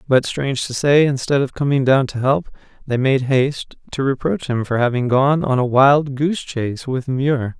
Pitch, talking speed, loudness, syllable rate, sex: 135 Hz, 205 wpm, -18 LUFS, 4.9 syllables/s, male